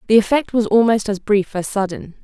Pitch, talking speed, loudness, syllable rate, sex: 210 Hz, 215 wpm, -17 LUFS, 5.5 syllables/s, female